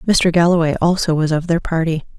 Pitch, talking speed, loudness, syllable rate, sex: 165 Hz, 190 wpm, -16 LUFS, 5.8 syllables/s, female